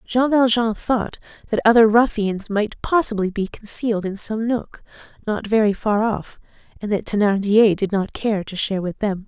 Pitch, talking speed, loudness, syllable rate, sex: 215 Hz, 175 wpm, -20 LUFS, 4.8 syllables/s, female